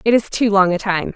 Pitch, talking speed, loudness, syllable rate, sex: 200 Hz, 310 wpm, -16 LUFS, 5.7 syllables/s, female